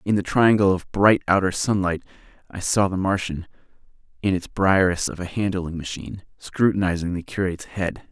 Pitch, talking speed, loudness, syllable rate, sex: 95 Hz, 165 wpm, -22 LUFS, 5.3 syllables/s, male